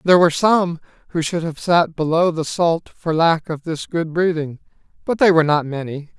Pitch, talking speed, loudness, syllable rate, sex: 165 Hz, 205 wpm, -18 LUFS, 5.1 syllables/s, male